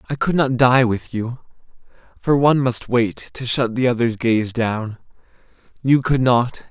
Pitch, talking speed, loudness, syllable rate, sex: 125 Hz, 170 wpm, -19 LUFS, 4.2 syllables/s, male